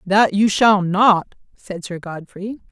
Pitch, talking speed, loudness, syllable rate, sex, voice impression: 195 Hz, 155 wpm, -16 LUFS, 3.5 syllables/s, female, slightly masculine, adult-like, slightly powerful, intellectual, slightly calm